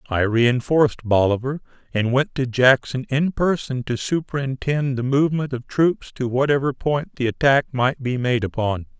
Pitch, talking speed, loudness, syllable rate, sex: 130 Hz, 160 wpm, -21 LUFS, 4.7 syllables/s, male